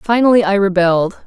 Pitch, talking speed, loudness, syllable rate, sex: 200 Hz, 140 wpm, -13 LUFS, 6.0 syllables/s, female